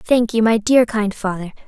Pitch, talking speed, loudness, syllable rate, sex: 220 Hz, 215 wpm, -17 LUFS, 4.6 syllables/s, female